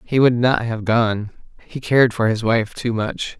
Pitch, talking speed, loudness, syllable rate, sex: 115 Hz, 210 wpm, -19 LUFS, 4.4 syllables/s, male